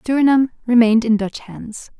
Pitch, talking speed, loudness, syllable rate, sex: 240 Hz, 150 wpm, -16 LUFS, 5.5 syllables/s, female